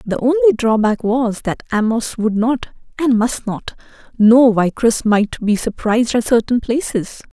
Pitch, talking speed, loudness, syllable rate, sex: 235 Hz, 165 wpm, -16 LUFS, 4.5 syllables/s, female